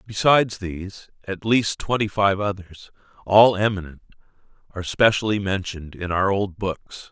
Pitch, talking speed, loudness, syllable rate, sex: 100 Hz, 135 wpm, -21 LUFS, 4.8 syllables/s, male